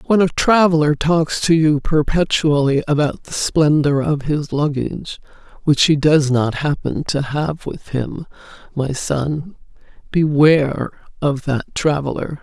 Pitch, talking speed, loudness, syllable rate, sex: 150 Hz, 135 wpm, -17 LUFS, 4.0 syllables/s, female